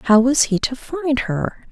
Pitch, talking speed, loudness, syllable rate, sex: 250 Hz, 210 wpm, -19 LUFS, 3.6 syllables/s, female